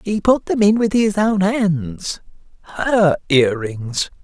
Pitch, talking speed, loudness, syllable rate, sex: 185 Hz, 155 wpm, -17 LUFS, 3.3 syllables/s, male